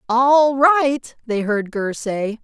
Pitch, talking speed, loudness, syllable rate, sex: 245 Hz, 150 wpm, -18 LUFS, 2.8 syllables/s, female